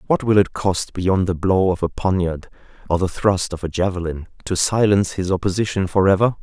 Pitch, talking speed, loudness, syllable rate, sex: 95 Hz, 205 wpm, -19 LUFS, 5.5 syllables/s, male